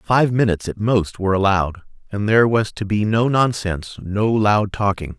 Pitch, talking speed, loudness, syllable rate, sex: 105 Hz, 185 wpm, -19 LUFS, 5.2 syllables/s, male